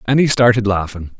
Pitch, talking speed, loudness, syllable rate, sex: 110 Hz, 200 wpm, -15 LUFS, 5.7 syllables/s, male